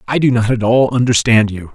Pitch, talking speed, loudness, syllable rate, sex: 115 Hz, 240 wpm, -13 LUFS, 5.7 syllables/s, male